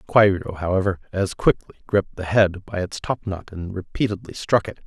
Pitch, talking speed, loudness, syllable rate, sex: 95 Hz, 175 wpm, -23 LUFS, 5.4 syllables/s, male